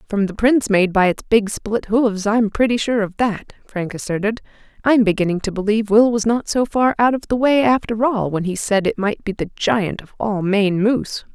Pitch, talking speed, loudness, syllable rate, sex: 215 Hz, 225 wpm, -18 LUFS, 5.1 syllables/s, female